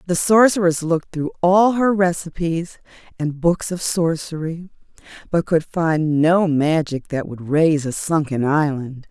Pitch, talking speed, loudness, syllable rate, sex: 165 Hz, 145 wpm, -19 LUFS, 4.2 syllables/s, female